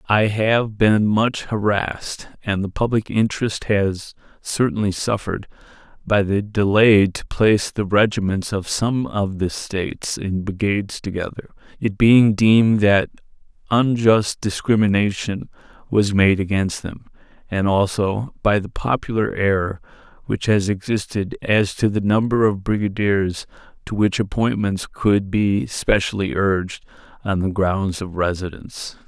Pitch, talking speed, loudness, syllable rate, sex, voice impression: 105 Hz, 130 wpm, -19 LUFS, 4.3 syllables/s, male, very masculine, very adult-like, slightly thick, sincere, wild